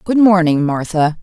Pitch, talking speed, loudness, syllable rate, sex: 175 Hz, 145 wpm, -14 LUFS, 4.5 syllables/s, female